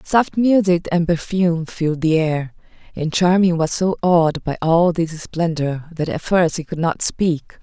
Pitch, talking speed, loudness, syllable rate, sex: 170 Hz, 180 wpm, -18 LUFS, 4.2 syllables/s, female